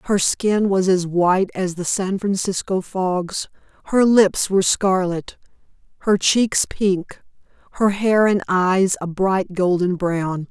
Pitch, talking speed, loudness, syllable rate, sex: 190 Hz, 145 wpm, -19 LUFS, 3.6 syllables/s, female